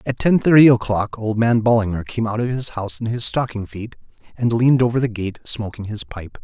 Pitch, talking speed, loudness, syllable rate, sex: 115 Hz, 225 wpm, -19 LUFS, 5.6 syllables/s, male